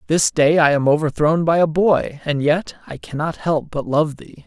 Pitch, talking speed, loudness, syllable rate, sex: 155 Hz, 215 wpm, -18 LUFS, 4.7 syllables/s, male